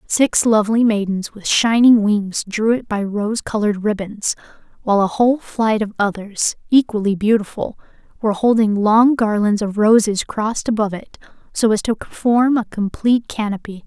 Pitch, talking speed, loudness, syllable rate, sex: 215 Hz, 155 wpm, -17 LUFS, 5.0 syllables/s, female